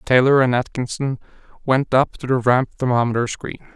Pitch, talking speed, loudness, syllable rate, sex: 130 Hz, 160 wpm, -19 LUFS, 5.2 syllables/s, male